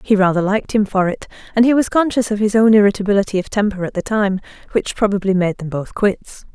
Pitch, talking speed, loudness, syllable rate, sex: 205 Hz, 230 wpm, -17 LUFS, 6.2 syllables/s, female